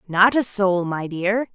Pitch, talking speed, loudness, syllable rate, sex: 200 Hz, 195 wpm, -20 LUFS, 3.8 syllables/s, female